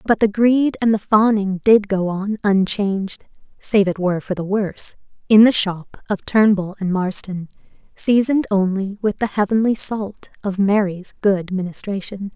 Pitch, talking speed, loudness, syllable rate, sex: 200 Hz, 160 wpm, -18 LUFS, 4.6 syllables/s, female